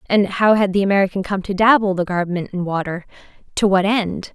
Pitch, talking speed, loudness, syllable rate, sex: 190 Hz, 195 wpm, -18 LUFS, 5.6 syllables/s, female